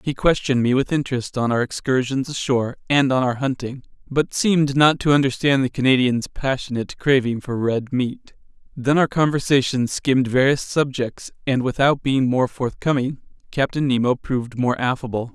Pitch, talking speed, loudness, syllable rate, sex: 130 Hz, 160 wpm, -20 LUFS, 5.2 syllables/s, male